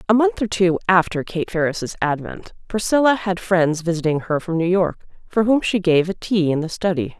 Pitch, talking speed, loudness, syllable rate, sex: 180 Hz, 210 wpm, -19 LUFS, 5.1 syllables/s, female